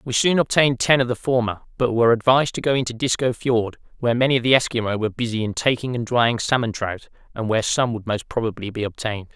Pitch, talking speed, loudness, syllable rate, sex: 120 Hz, 230 wpm, -21 LUFS, 6.7 syllables/s, male